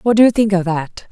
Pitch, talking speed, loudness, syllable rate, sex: 200 Hz, 325 wpm, -15 LUFS, 5.6 syllables/s, female